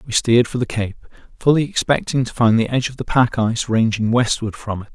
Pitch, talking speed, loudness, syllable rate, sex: 120 Hz, 230 wpm, -18 LUFS, 6.1 syllables/s, male